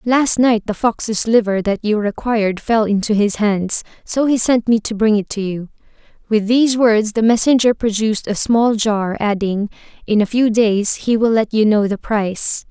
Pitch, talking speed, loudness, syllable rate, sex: 215 Hz, 200 wpm, -16 LUFS, 4.6 syllables/s, female